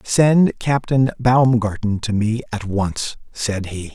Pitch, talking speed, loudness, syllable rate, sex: 115 Hz, 135 wpm, -19 LUFS, 3.4 syllables/s, male